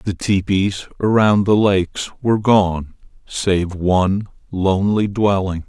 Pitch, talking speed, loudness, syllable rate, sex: 95 Hz, 115 wpm, -17 LUFS, 3.9 syllables/s, male